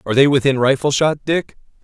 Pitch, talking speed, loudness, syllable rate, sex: 140 Hz, 195 wpm, -16 LUFS, 6.1 syllables/s, male